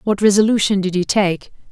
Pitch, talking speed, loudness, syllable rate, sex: 200 Hz, 175 wpm, -16 LUFS, 5.5 syllables/s, female